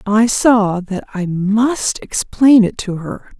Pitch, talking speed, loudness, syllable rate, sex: 210 Hz, 160 wpm, -15 LUFS, 3.2 syllables/s, female